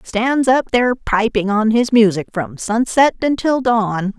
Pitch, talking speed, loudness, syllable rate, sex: 225 Hz, 160 wpm, -16 LUFS, 4.1 syllables/s, female